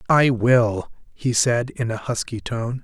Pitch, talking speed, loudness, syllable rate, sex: 120 Hz, 170 wpm, -21 LUFS, 3.7 syllables/s, male